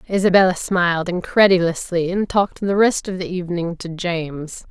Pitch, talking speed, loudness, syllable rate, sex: 180 Hz, 155 wpm, -19 LUFS, 5.4 syllables/s, female